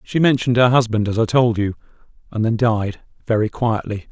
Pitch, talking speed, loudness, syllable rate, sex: 115 Hz, 190 wpm, -18 LUFS, 5.5 syllables/s, male